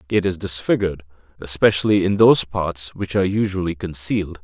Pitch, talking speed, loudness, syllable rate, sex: 90 Hz, 150 wpm, -19 LUFS, 5.9 syllables/s, male